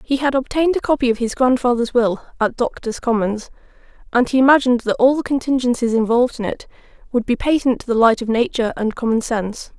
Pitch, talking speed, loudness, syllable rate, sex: 245 Hz, 200 wpm, -18 LUFS, 6.3 syllables/s, female